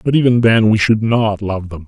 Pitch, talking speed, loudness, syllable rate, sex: 110 Hz, 255 wpm, -14 LUFS, 5.1 syllables/s, male